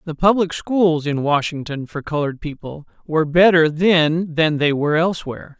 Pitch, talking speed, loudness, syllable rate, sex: 160 Hz, 160 wpm, -18 LUFS, 5.2 syllables/s, male